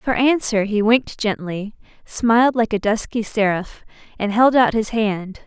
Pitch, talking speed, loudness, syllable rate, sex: 220 Hz, 165 wpm, -19 LUFS, 4.4 syllables/s, female